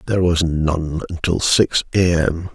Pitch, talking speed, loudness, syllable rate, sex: 85 Hz, 165 wpm, -18 LUFS, 4.1 syllables/s, male